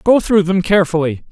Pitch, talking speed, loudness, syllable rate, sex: 180 Hz, 180 wpm, -14 LUFS, 6.1 syllables/s, male